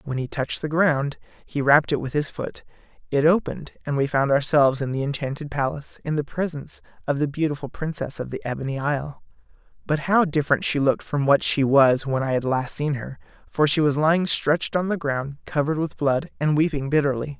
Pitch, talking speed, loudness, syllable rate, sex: 145 Hz, 210 wpm, -23 LUFS, 5.9 syllables/s, male